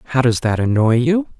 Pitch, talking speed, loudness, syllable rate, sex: 125 Hz, 215 wpm, -16 LUFS, 5.5 syllables/s, male